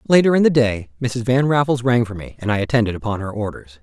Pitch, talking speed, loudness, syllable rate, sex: 115 Hz, 250 wpm, -19 LUFS, 6.3 syllables/s, male